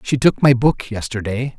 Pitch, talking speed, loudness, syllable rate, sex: 125 Hz, 190 wpm, -17 LUFS, 4.8 syllables/s, male